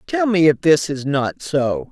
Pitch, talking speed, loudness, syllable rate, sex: 175 Hz, 220 wpm, -18 LUFS, 4.0 syllables/s, female